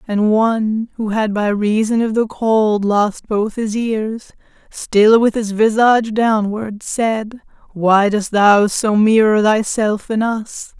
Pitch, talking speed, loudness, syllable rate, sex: 215 Hz, 150 wpm, -15 LUFS, 3.5 syllables/s, female